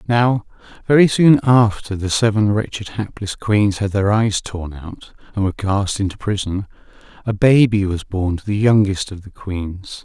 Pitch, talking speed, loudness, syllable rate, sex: 105 Hz, 175 wpm, -18 LUFS, 4.5 syllables/s, male